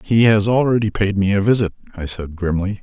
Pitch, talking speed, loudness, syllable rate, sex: 100 Hz, 210 wpm, -18 LUFS, 5.7 syllables/s, male